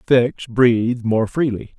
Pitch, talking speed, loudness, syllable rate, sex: 120 Hz, 135 wpm, -18 LUFS, 3.8 syllables/s, male